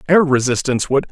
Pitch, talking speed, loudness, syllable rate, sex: 140 Hz, 160 wpm, -16 LUFS, 6.7 syllables/s, male